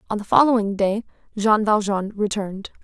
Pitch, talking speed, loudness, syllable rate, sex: 210 Hz, 150 wpm, -20 LUFS, 5.4 syllables/s, female